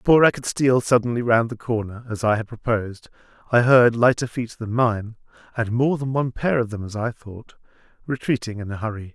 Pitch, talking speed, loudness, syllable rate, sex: 115 Hz, 195 wpm, -21 LUFS, 5.7 syllables/s, male